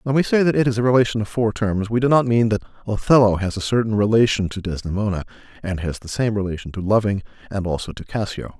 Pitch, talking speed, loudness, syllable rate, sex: 110 Hz, 235 wpm, -20 LUFS, 6.5 syllables/s, male